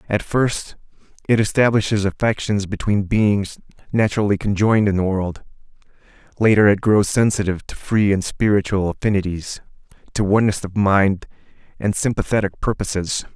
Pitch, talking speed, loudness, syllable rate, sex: 100 Hz, 125 wpm, -19 LUFS, 5.3 syllables/s, male